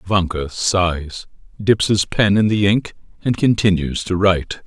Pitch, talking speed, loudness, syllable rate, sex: 95 Hz, 155 wpm, -18 LUFS, 4.1 syllables/s, male